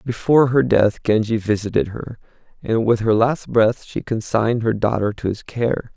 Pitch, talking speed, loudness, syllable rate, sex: 110 Hz, 180 wpm, -19 LUFS, 4.9 syllables/s, male